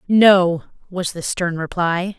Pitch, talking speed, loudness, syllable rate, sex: 180 Hz, 135 wpm, -18 LUFS, 3.4 syllables/s, female